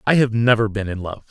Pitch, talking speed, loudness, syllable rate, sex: 110 Hz, 275 wpm, -19 LUFS, 6.1 syllables/s, male